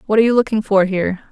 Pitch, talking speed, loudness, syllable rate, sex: 205 Hz, 275 wpm, -16 LUFS, 8.2 syllables/s, female